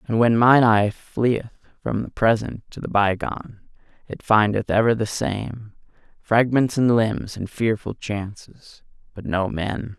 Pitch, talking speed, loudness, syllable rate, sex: 110 Hz, 145 wpm, -21 LUFS, 4.0 syllables/s, male